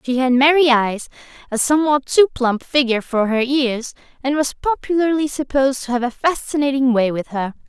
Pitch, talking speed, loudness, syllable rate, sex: 265 Hz, 180 wpm, -18 LUFS, 5.4 syllables/s, female